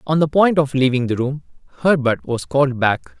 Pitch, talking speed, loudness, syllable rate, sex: 140 Hz, 205 wpm, -18 LUFS, 5.6 syllables/s, male